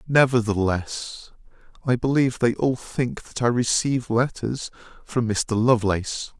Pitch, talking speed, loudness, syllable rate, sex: 120 Hz, 120 wpm, -23 LUFS, 4.5 syllables/s, male